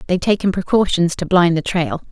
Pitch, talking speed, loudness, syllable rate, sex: 180 Hz, 200 wpm, -17 LUFS, 5.9 syllables/s, female